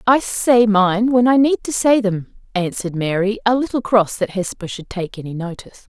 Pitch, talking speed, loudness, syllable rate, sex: 210 Hz, 200 wpm, -18 LUFS, 5.1 syllables/s, female